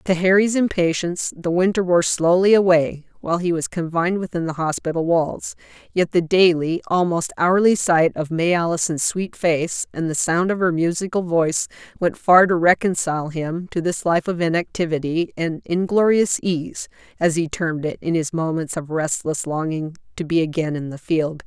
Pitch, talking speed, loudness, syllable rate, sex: 170 Hz, 175 wpm, -20 LUFS, 5.0 syllables/s, female